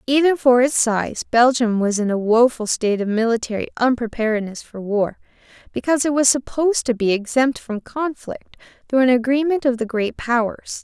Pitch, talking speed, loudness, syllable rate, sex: 240 Hz, 170 wpm, -19 LUFS, 5.3 syllables/s, female